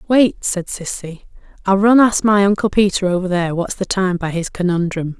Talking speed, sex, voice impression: 195 wpm, female, feminine, middle-aged, slightly relaxed, slightly powerful, soft, raspy, friendly, reassuring, elegant, slightly lively, kind